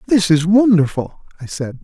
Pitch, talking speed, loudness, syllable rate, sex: 175 Hz, 165 wpm, -15 LUFS, 4.7 syllables/s, male